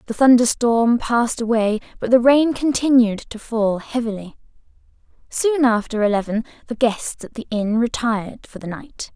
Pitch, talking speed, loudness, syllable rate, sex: 235 Hz, 150 wpm, -19 LUFS, 4.8 syllables/s, female